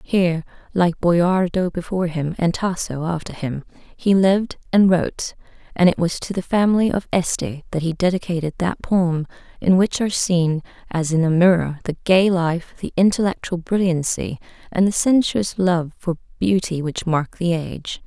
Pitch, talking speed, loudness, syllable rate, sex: 175 Hz, 165 wpm, -20 LUFS, 4.8 syllables/s, female